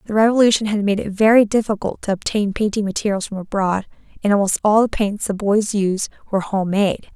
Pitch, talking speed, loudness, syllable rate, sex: 205 Hz, 195 wpm, -18 LUFS, 5.8 syllables/s, female